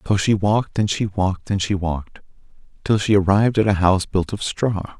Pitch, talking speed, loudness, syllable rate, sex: 100 Hz, 215 wpm, -20 LUFS, 5.8 syllables/s, male